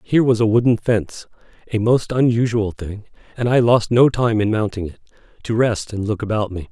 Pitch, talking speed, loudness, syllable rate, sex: 110 Hz, 190 wpm, -18 LUFS, 5.5 syllables/s, male